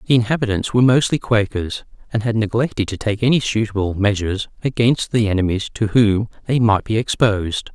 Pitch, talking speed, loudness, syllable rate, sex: 110 Hz, 170 wpm, -18 LUFS, 5.8 syllables/s, male